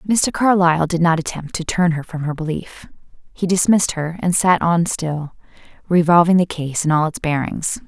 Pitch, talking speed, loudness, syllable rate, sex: 170 Hz, 190 wpm, -18 LUFS, 5.1 syllables/s, female